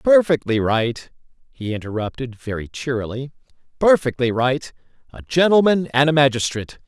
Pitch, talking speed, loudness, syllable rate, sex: 135 Hz, 105 wpm, -19 LUFS, 5.1 syllables/s, male